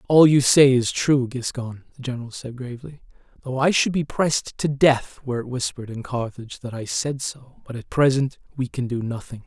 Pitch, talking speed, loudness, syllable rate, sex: 130 Hz, 210 wpm, -22 LUFS, 5.4 syllables/s, male